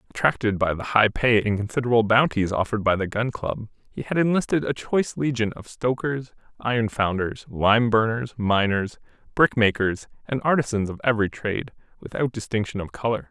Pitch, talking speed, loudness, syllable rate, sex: 115 Hz, 160 wpm, -23 LUFS, 5.6 syllables/s, male